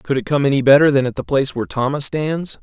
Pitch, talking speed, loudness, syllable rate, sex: 135 Hz, 275 wpm, -16 LUFS, 6.6 syllables/s, male